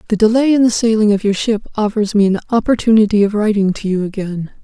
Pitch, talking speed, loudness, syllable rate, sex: 210 Hz, 220 wpm, -15 LUFS, 6.3 syllables/s, female